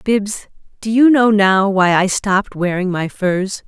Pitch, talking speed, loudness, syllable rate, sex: 200 Hz, 180 wpm, -15 LUFS, 4.0 syllables/s, female